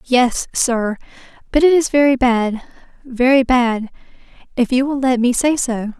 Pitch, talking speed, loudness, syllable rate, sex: 250 Hz, 160 wpm, -16 LUFS, 4.3 syllables/s, female